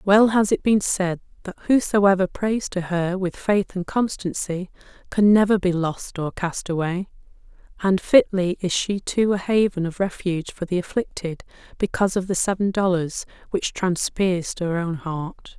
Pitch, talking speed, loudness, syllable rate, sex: 185 Hz, 165 wpm, -22 LUFS, 4.5 syllables/s, female